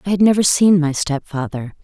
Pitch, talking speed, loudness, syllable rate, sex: 170 Hz, 195 wpm, -16 LUFS, 5.4 syllables/s, female